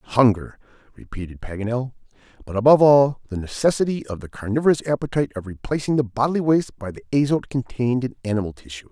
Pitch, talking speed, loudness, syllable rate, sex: 125 Hz, 160 wpm, -21 LUFS, 6.8 syllables/s, male